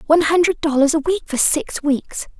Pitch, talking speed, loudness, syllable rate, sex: 310 Hz, 200 wpm, -17 LUFS, 5.2 syllables/s, female